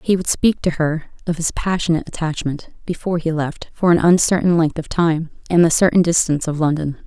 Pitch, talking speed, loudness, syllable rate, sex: 165 Hz, 205 wpm, -18 LUFS, 5.7 syllables/s, female